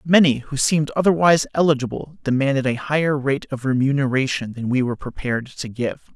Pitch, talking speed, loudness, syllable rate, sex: 140 Hz, 165 wpm, -20 LUFS, 6.1 syllables/s, male